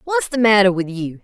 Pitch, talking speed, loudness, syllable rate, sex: 215 Hz, 240 wpm, -16 LUFS, 5.4 syllables/s, female